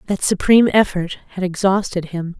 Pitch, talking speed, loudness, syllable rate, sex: 190 Hz, 150 wpm, -17 LUFS, 5.5 syllables/s, female